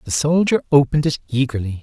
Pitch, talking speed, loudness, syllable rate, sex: 135 Hz, 165 wpm, -18 LUFS, 6.5 syllables/s, male